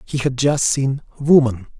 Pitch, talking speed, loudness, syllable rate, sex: 135 Hz, 165 wpm, -17 LUFS, 4.1 syllables/s, male